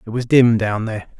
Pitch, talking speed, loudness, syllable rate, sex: 115 Hz, 250 wpm, -17 LUFS, 5.7 syllables/s, male